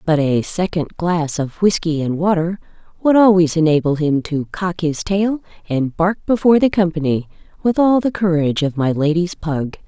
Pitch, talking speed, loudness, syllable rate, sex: 175 Hz, 175 wpm, -17 LUFS, 5.0 syllables/s, female